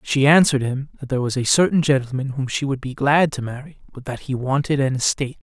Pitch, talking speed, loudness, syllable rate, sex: 135 Hz, 240 wpm, -20 LUFS, 6.3 syllables/s, male